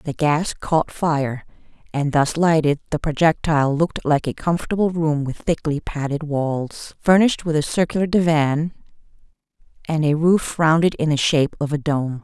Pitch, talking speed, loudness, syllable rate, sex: 155 Hz, 160 wpm, -20 LUFS, 4.8 syllables/s, female